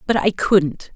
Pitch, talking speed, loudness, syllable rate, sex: 190 Hz, 190 wpm, -18 LUFS, 3.8 syllables/s, female